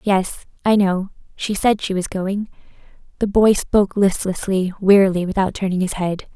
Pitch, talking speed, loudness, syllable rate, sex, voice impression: 195 Hz, 160 wpm, -19 LUFS, 4.8 syllables/s, female, feminine, adult-like, relaxed, bright, soft, clear, slightly raspy, cute, calm, elegant, lively, kind